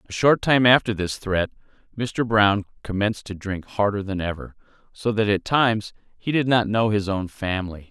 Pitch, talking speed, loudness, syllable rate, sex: 105 Hz, 190 wpm, -22 LUFS, 5.0 syllables/s, male